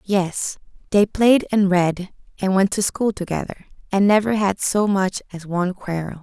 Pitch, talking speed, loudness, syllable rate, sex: 195 Hz, 175 wpm, -20 LUFS, 4.6 syllables/s, female